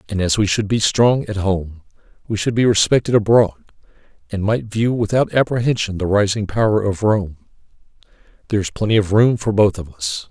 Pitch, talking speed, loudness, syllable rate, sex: 105 Hz, 185 wpm, -17 LUFS, 5.6 syllables/s, male